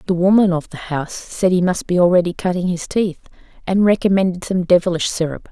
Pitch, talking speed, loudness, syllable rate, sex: 180 Hz, 195 wpm, -17 LUFS, 6.0 syllables/s, female